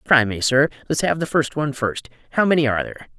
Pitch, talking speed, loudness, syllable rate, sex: 140 Hz, 205 wpm, -20 LUFS, 6.7 syllables/s, male